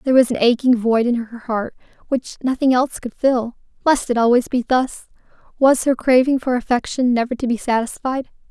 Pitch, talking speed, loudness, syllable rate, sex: 245 Hz, 190 wpm, -18 LUFS, 5.5 syllables/s, female